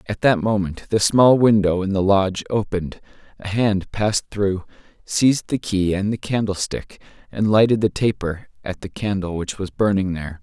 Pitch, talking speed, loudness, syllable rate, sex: 100 Hz, 180 wpm, -20 LUFS, 5.0 syllables/s, male